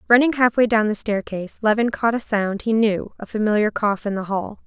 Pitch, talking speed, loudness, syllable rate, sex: 215 Hz, 220 wpm, -20 LUFS, 5.4 syllables/s, female